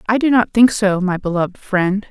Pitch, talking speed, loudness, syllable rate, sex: 200 Hz, 230 wpm, -16 LUFS, 5.2 syllables/s, female